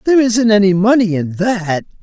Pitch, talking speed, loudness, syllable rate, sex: 205 Hz, 175 wpm, -13 LUFS, 5.2 syllables/s, male